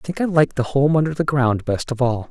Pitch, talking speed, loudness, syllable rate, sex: 140 Hz, 310 wpm, -19 LUFS, 6.3 syllables/s, male